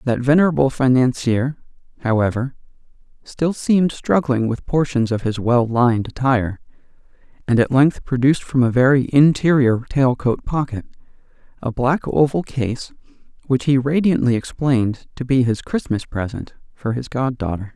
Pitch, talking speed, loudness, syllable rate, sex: 130 Hz, 140 wpm, -18 LUFS, 4.9 syllables/s, male